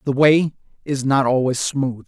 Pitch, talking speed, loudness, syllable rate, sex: 135 Hz, 175 wpm, -19 LUFS, 4.2 syllables/s, male